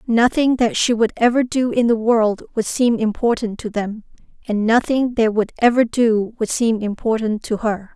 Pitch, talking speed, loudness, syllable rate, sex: 225 Hz, 190 wpm, -18 LUFS, 4.6 syllables/s, female